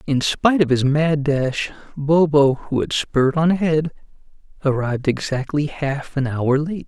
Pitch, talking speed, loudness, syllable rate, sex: 145 Hz, 155 wpm, -19 LUFS, 4.5 syllables/s, male